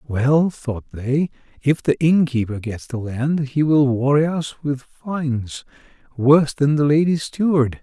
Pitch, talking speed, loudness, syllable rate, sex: 140 Hz, 155 wpm, -19 LUFS, 4.2 syllables/s, male